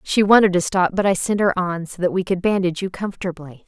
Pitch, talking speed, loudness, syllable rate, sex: 185 Hz, 260 wpm, -19 LUFS, 6.2 syllables/s, female